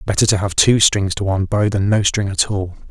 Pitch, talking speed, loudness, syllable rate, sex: 100 Hz, 270 wpm, -16 LUFS, 5.6 syllables/s, male